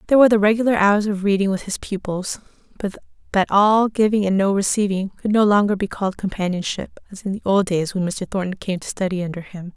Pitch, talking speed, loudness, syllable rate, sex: 200 Hz, 225 wpm, -20 LUFS, 6.1 syllables/s, female